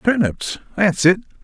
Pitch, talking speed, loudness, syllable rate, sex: 190 Hz, 125 wpm, -18 LUFS, 3.9 syllables/s, male